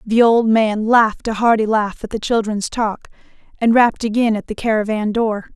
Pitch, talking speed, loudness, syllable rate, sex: 220 Hz, 195 wpm, -17 LUFS, 5.2 syllables/s, female